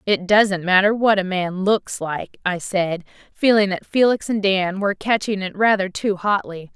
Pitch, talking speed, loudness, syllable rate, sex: 195 Hz, 185 wpm, -19 LUFS, 4.5 syllables/s, female